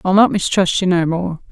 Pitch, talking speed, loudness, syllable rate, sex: 180 Hz, 235 wpm, -16 LUFS, 5.2 syllables/s, female